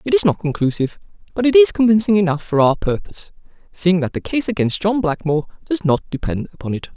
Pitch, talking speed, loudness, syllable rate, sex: 180 Hz, 205 wpm, -18 LUFS, 6.3 syllables/s, male